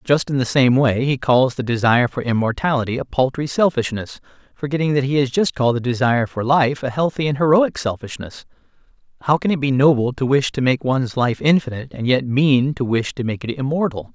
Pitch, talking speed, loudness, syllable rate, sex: 130 Hz, 210 wpm, -18 LUFS, 5.8 syllables/s, male